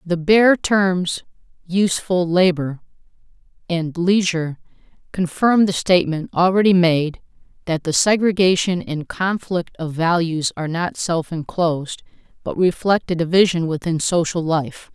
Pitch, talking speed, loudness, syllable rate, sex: 175 Hz, 120 wpm, -19 LUFS, 4.4 syllables/s, female